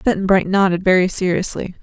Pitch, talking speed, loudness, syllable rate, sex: 190 Hz, 165 wpm, -17 LUFS, 6.0 syllables/s, female